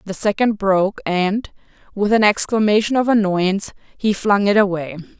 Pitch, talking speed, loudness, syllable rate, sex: 200 Hz, 150 wpm, -18 LUFS, 4.9 syllables/s, female